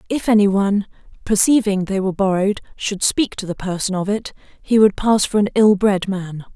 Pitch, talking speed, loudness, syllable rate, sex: 200 Hz, 200 wpm, -18 LUFS, 5.4 syllables/s, female